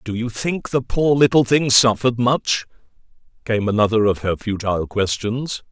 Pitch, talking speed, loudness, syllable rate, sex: 115 Hz, 160 wpm, -18 LUFS, 4.8 syllables/s, male